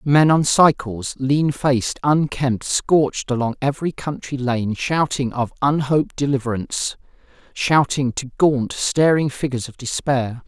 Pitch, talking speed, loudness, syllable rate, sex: 135 Hz, 125 wpm, -19 LUFS, 4.4 syllables/s, male